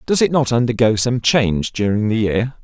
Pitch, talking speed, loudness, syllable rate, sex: 115 Hz, 205 wpm, -17 LUFS, 5.3 syllables/s, male